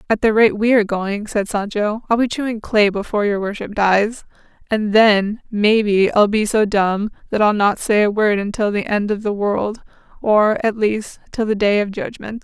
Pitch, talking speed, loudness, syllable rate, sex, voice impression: 210 Hz, 205 wpm, -17 LUFS, 4.7 syllables/s, female, feminine, slightly gender-neutral, slightly young, slightly adult-like, thin, slightly tensed, slightly weak, bright, hard, clear, fluent, slightly cool, intellectual, slightly refreshing, sincere, calm, friendly, slightly reassuring, unique, elegant, slightly sweet, lively, slightly kind, slightly modest